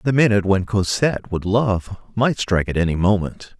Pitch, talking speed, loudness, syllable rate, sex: 100 Hz, 185 wpm, -19 LUFS, 5.6 syllables/s, male